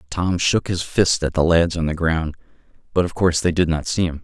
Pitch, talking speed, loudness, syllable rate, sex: 85 Hz, 255 wpm, -20 LUFS, 5.5 syllables/s, male